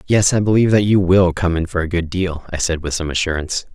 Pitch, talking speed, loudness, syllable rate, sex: 90 Hz, 270 wpm, -17 LUFS, 6.3 syllables/s, male